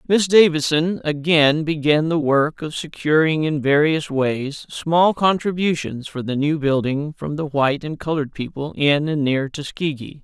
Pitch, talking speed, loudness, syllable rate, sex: 150 Hz, 160 wpm, -19 LUFS, 4.4 syllables/s, male